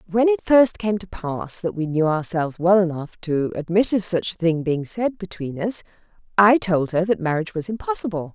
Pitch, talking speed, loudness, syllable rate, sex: 185 Hz, 210 wpm, -21 LUFS, 5.1 syllables/s, female